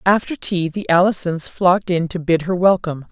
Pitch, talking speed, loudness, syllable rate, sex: 180 Hz, 195 wpm, -18 LUFS, 5.3 syllables/s, female